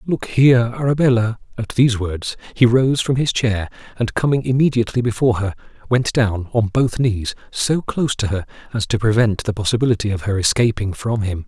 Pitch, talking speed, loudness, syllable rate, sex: 115 Hz, 185 wpm, -18 LUFS, 5.6 syllables/s, male